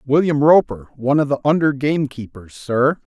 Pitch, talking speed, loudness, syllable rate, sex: 140 Hz, 150 wpm, -17 LUFS, 5.4 syllables/s, male